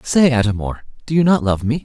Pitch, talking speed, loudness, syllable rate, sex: 125 Hz, 260 wpm, -17 LUFS, 5.9 syllables/s, male